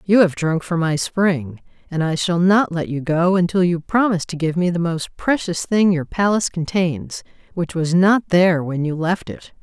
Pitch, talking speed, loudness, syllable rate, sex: 175 Hz, 210 wpm, -19 LUFS, 4.7 syllables/s, female